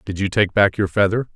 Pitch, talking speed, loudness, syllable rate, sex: 100 Hz, 265 wpm, -18 LUFS, 5.8 syllables/s, male